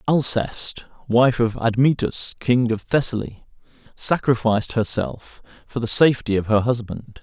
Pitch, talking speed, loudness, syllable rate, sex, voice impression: 120 Hz, 125 wpm, -21 LUFS, 4.6 syllables/s, male, very masculine, very adult-like, slightly thick, cool, slightly intellectual